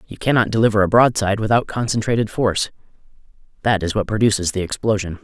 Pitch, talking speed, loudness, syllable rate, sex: 105 Hz, 150 wpm, -18 LUFS, 6.7 syllables/s, male